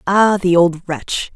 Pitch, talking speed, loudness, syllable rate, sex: 180 Hz, 175 wpm, -16 LUFS, 3.3 syllables/s, female